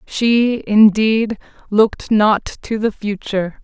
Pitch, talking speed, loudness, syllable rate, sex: 215 Hz, 115 wpm, -16 LUFS, 3.5 syllables/s, female